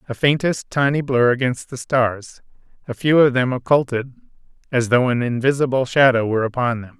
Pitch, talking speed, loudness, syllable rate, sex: 125 Hz, 170 wpm, -18 LUFS, 5.3 syllables/s, male